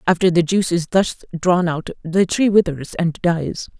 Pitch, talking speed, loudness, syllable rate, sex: 175 Hz, 190 wpm, -18 LUFS, 4.5 syllables/s, female